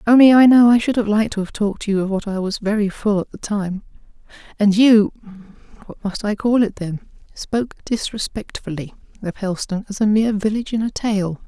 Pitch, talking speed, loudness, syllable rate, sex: 210 Hz, 200 wpm, -18 LUFS, 6.1 syllables/s, female